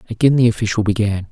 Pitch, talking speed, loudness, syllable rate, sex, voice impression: 110 Hz, 185 wpm, -16 LUFS, 7.2 syllables/s, male, masculine, adult-like, relaxed, slightly weak, slightly halting, slightly raspy, cool, intellectual, sincere, kind, modest